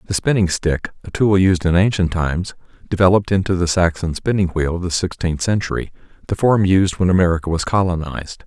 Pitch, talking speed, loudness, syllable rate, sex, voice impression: 90 Hz, 185 wpm, -18 LUFS, 5.9 syllables/s, male, very masculine, very adult-like, slightly thick, cool, sincere, slightly calm, slightly friendly, slightly elegant